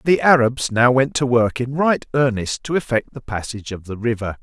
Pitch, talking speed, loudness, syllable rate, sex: 125 Hz, 215 wpm, -19 LUFS, 5.2 syllables/s, male